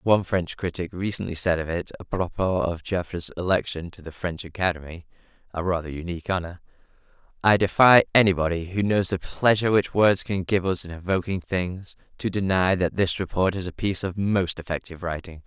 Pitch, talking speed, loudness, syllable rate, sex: 90 Hz, 180 wpm, -24 LUFS, 5.6 syllables/s, male